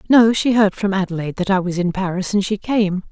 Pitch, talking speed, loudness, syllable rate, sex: 195 Hz, 250 wpm, -18 LUFS, 5.9 syllables/s, female